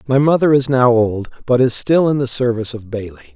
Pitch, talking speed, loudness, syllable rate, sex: 125 Hz, 230 wpm, -15 LUFS, 6.0 syllables/s, male